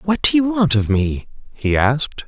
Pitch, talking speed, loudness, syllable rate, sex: 125 Hz, 210 wpm, -18 LUFS, 4.7 syllables/s, male